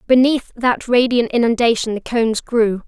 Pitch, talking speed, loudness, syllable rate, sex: 235 Hz, 145 wpm, -17 LUFS, 4.9 syllables/s, female